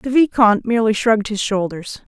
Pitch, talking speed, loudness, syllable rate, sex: 220 Hz, 165 wpm, -17 LUFS, 5.9 syllables/s, female